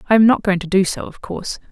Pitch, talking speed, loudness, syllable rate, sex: 195 Hz, 315 wpm, -18 LUFS, 7.0 syllables/s, female